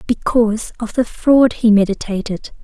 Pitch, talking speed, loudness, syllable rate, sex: 225 Hz, 135 wpm, -16 LUFS, 4.7 syllables/s, female